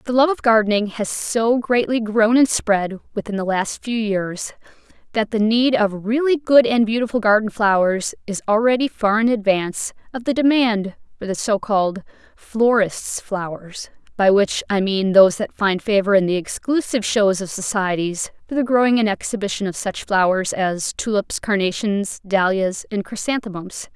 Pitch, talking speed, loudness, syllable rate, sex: 215 Hz, 165 wpm, -19 LUFS, 4.8 syllables/s, female